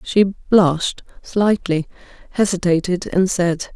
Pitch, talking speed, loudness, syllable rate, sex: 185 Hz, 95 wpm, -18 LUFS, 3.7 syllables/s, female